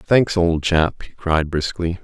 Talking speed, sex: 175 wpm, male